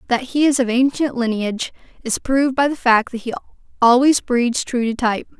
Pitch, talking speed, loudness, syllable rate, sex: 250 Hz, 200 wpm, -18 LUFS, 5.6 syllables/s, female